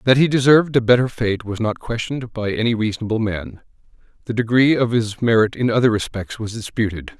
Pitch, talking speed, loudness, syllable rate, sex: 115 Hz, 190 wpm, -19 LUFS, 6.0 syllables/s, male